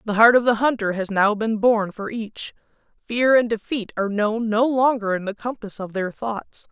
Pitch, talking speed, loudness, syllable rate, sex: 220 Hz, 215 wpm, -21 LUFS, 4.8 syllables/s, female